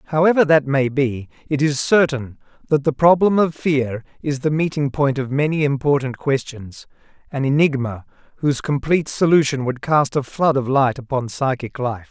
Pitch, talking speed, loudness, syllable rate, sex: 140 Hz, 170 wpm, -19 LUFS, 5.0 syllables/s, male